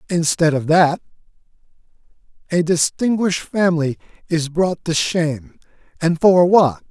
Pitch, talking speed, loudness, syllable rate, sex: 170 Hz, 115 wpm, -17 LUFS, 4.5 syllables/s, male